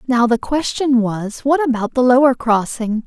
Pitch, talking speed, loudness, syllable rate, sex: 245 Hz, 175 wpm, -16 LUFS, 4.5 syllables/s, female